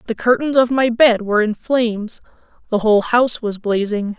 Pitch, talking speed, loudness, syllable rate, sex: 225 Hz, 185 wpm, -17 LUFS, 5.4 syllables/s, female